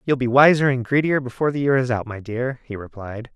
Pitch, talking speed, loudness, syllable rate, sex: 125 Hz, 250 wpm, -19 LUFS, 6.0 syllables/s, male